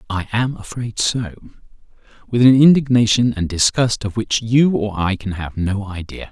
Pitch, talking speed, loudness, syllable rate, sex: 110 Hz, 160 wpm, -17 LUFS, 4.7 syllables/s, male